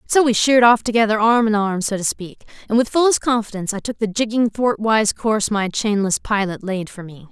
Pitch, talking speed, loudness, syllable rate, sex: 215 Hz, 220 wpm, -18 LUFS, 5.8 syllables/s, female